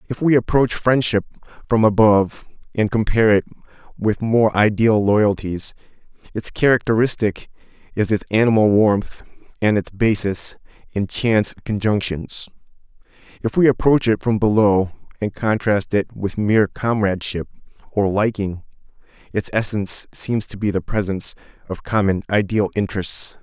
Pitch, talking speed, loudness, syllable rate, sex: 105 Hz, 130 wpm, -19 LUFS, 4.9 syllables/s, male